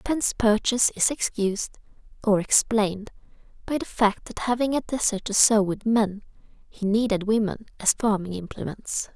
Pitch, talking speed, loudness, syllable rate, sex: 215 Hz, 150 wpm, -24 LUFS, 4.8 syllables/s, female